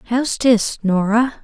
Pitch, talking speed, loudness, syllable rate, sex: 225 Hz, 125 wpm, -17 LUFS, 3.9 syllables/s, female